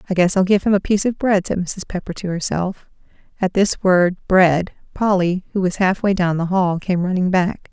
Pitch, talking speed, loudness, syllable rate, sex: 185 Hz, 225 wpm, -18 LUFS, 5.1 syllables/s, female